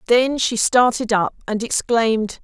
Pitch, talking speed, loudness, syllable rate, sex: 230 Hz, 150 wpm, -18 LUFS, 4.3 syllables/s, female